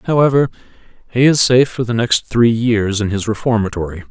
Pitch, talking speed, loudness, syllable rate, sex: 115 Hz, 175 wpm, -15 LUFS, 5.5 syllables/s, male